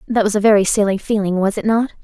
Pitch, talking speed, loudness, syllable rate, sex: 210 Hz, 265 wpm, -16 LUFS, 6.7 syllables/s, female